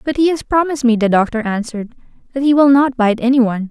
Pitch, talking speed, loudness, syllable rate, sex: 250 Hz, 245 wpm, -14 LUFS, 6.8 syllables/s, female